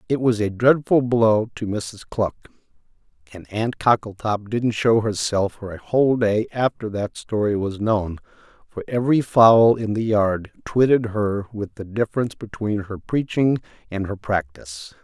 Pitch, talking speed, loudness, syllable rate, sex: 110 Hz, 160 wpm, -21 LUFS, 4.5 syllables/s, male